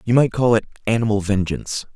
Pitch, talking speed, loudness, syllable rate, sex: 110 Hz, 185 wpm, -20 LUFS, 6.3 syllables/s, male